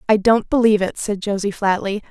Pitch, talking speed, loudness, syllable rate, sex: 205 Hz, 200 wpm, -18 LUFS, 5.9 syllables/s, female